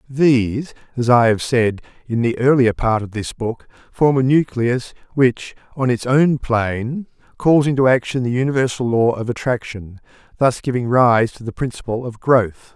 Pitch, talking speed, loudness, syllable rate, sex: 125 Hz, 170 wpm, -18 LUFS, 4.7 syllables/s, male